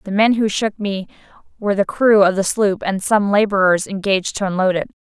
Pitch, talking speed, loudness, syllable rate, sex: 200 Hz, 215 wpm, -17 LUFS, 5.6 syllables/s, female